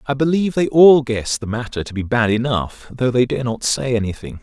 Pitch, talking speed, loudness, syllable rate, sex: 125 Hz, 245 wpm, -17 LUFS, 5.4 syllables/s, male